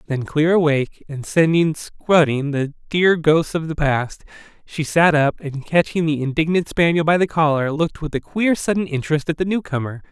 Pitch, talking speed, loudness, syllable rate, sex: 155 Hz, 190 wpm, -19 LUFS, 5.1 syllables/s, male